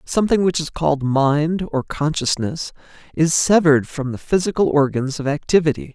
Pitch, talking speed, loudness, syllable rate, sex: 155 Hz, 150 wpm, -19 LUFS, 5.2 syllables/s, male